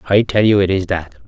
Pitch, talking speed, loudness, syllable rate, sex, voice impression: 95 Hz, 285 wpm, -15 LUFS, 5.6 syllables/s, male, masculine, adult-like, slightly soft, slightly sincere, friendly, kind